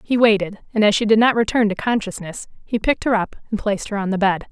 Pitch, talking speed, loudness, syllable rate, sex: 210 Hz, 265 wpm, -19 LUFS, 6.6 syllables/s, female